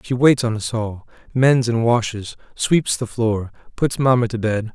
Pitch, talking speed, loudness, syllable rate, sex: 115 Hz, 190 wpm, -19 LUFS, 4.3 syllables/s, male